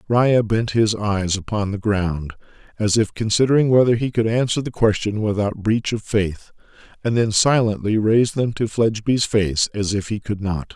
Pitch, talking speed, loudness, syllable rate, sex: 110 Hz, 185 wpm, -20 LUFS, 4.8 syllables/s, male